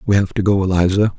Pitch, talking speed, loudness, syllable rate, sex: 95 Hz, 255 wpm, -16 LUFS, 6.6 syllables/s, male